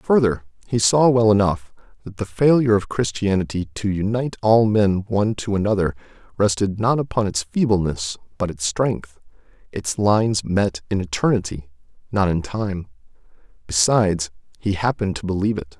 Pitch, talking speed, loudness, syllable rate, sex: 100 Hz, 150 wpm, -20 LUFS, 5.2 syllables/s, male